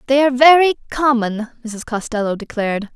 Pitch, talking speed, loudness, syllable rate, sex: 245 Hz, 140 wpm, -16 LUFS, 5.5 syllables/s, female